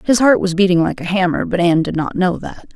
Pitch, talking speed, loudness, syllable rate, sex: 185 Hz, 285 wpm, -16 LUFS, 6.2 syllables/s, female